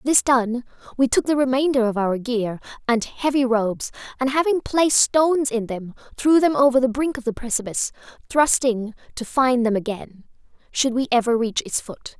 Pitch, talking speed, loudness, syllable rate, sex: 250 Hz, 180 wpm, -21 LUFS, 5.1 syllables/s, female